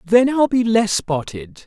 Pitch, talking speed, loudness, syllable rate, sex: 205 Hz, 180 wpm, -17 LUFS, 3.8 syllables/s, male